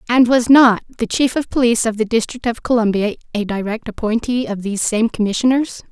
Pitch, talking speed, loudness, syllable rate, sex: 230 Hz, 195 wpm, -17 LUFS, 5.8 syllables/s, female